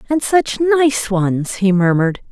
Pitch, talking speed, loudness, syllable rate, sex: 225 Hz, 155 wpm, -15 LUFS, 3.9 syllables/s, female